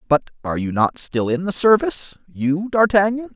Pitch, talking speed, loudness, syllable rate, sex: 175 Hz, 160 wpm, -19 LUFS, 5.3 syllables/s, male